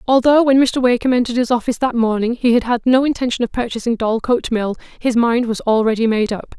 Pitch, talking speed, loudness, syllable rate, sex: 240 Hz, 220 wpm, -16 LUFS, 6.3 syllables/s, female